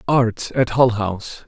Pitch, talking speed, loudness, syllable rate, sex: 115 Hz, 165 wpm, -19 LUFS, 3.8 syllables/s, male